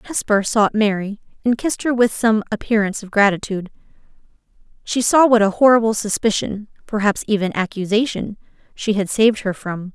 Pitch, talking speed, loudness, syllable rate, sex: 215 Hz, 150 wpm, -18 LUFS, 5.7 syllables/s, female